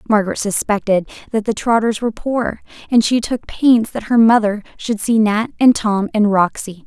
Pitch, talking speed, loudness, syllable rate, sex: 220 Hz, 185 wpm, -16 LUFS, 4.9 syllables/s, female